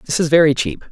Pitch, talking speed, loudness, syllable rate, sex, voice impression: 145 Hz, 265 wpm, -15 LUFS, 5.8 syllables/s, male, masculine, adult-like, tensed, slightly weak, bright, clear, fluent, cool, intellectual, refreshing, calm, friendly, reassuring, lively, kind